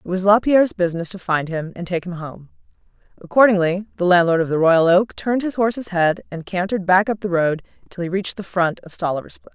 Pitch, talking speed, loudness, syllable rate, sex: 185 Hz, 225 wpm, -19 LUFS, 6.3 syllables/s, female